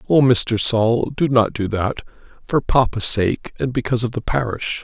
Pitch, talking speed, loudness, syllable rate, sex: 120 Hz, 175 wpm, -19 LUFS, 4.7 syllables/s, male